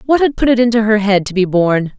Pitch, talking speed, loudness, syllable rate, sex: 220 Hz, 300 wpm, -13 LUFS, 6.0 syllables/s, female